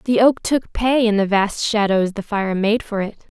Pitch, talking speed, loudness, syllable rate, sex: 215 Hz, 230 wpm, -19 LUFS, 4.6 syllables/s, female